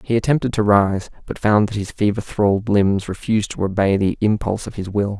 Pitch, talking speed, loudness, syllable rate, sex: 105 Hz, 220 wpm, -19 LUFS, 5.7 syllables/s, male